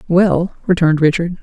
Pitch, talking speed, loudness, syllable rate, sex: 170 Hz, 125 wpm, -15 LUFS, 5.6 syllables/s, female